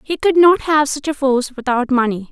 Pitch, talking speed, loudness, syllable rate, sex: 275 Hz, 235 wpm, -15 LUFS, 5.4 syllables/s, female